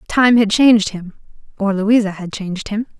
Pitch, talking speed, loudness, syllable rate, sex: 210 Hz, 180 wpm, -16 LUFS, 5.1 syllables/s, female